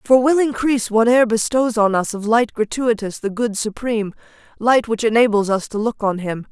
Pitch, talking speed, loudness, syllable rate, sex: 225 Hz, 195 wpm, -18 LUFS, 5.4 syllables/s, female